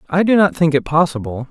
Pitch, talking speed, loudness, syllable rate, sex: 160 Hz, 240 wpm, -15 LUFS, 6.1 syllables/s, male